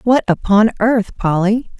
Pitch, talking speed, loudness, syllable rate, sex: 215 Hz, 135 wpm, -15 LUFS, 4.0 syllables/s, female